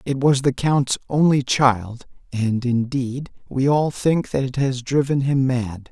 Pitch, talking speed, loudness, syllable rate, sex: 130 Hz, 170 wpm, -20 LUFS, 3.8 syllables/s, male